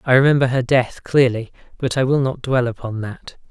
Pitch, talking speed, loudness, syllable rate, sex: 125 Hz, 205 wpm, -18 LUFS, 5.3 syllables/s, male